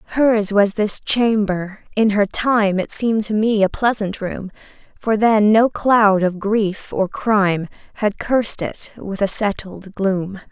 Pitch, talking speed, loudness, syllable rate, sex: 210 Hz, 165 wpm, -18 LUFS, 3.8 syllables/s, female